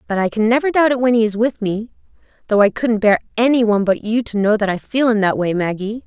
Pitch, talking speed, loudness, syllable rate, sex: 220 Hz, 275 wpm, -17 LUFS, 6.2 syllables/s, female